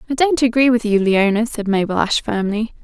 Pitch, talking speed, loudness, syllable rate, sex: 225 Hz, 210 wpm, -17 LUFS, 5.9 syllables/s, female